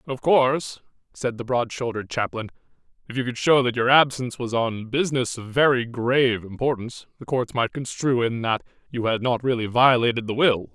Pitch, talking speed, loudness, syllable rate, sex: 125 Hz, 190 wpm, -22 LUFS, 5.6 syllables/s, male